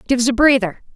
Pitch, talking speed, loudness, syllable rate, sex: 245 Hz, 190 wpm, -15 LUFS, 7.4 syllables/s, female